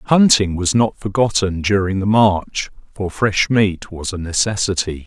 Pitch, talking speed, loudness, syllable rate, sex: 100 Hz, 155 wpm, -17 LUFS, 4.2 syllables/s, male